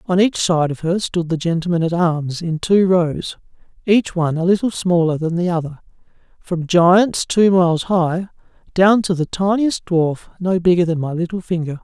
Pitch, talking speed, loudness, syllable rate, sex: 175 Hz, 190 wpm, -17 LUFS, 4.8 syllables/s, male